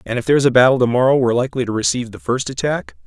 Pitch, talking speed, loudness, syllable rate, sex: 115 Hz, 275 wpm, -17 LUFS, 8.0 syllables/s, male